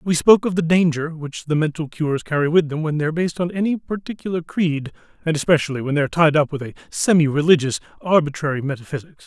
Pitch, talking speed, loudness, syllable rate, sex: 160 Hz, 215 wpm, -20 LUFS, 6.7 syllables/s, male